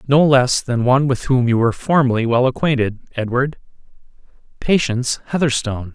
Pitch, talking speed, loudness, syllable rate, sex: 125 Hz, 130 wpm, -17 LUFS, 5.6 syllables/s, male